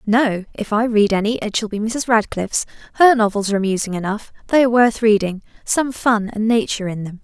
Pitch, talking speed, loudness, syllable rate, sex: 220 Hz, 205 wpm, -18 LUFS, 5.9 syllables/s, female